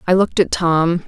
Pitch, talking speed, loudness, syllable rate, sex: 175 Hz, 225 wpm, -16 LUFS, 5.4 syllables/s, female